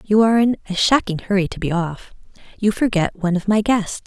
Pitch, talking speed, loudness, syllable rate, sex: 200 Hz, 205 wpm, -19 LUFS, 5.9 syllables/s, female